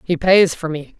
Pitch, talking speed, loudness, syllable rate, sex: 165 Hz, 240 wpm, -15 LUFS, 4.6 syllables/s, female